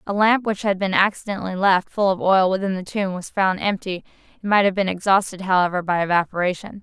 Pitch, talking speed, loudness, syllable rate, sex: 190 Hz, 210 wpm, -20 LUFS, 6.0 syllables/s, female